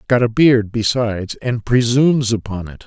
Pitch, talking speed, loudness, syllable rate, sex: 115 Hz, 170 wpm, -16 LUFS, 4.8 syllables/s, male